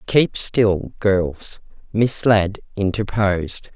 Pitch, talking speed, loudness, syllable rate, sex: 100 Hz, 95 wpm, -19 LUFS, 2.9 syllables/s, female